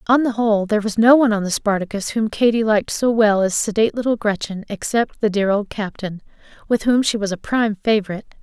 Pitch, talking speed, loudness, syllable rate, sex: 215 Hz, 220 wpm, -18 LUFS, 6.3 syllables/s, female